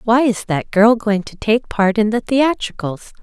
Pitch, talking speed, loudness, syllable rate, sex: 220 Hz, 205 wpm, -17 LUFS, 4.3 syllables/s, female